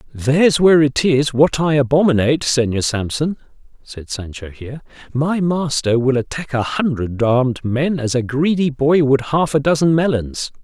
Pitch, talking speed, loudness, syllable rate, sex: 140 Hz, 165 wpm, -17 LUFS, 4.8 syllables/s, male